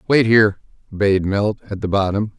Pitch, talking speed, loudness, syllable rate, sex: 105 Hz, 175 wpm, -18 LUFS, 5.0 syllables/s, male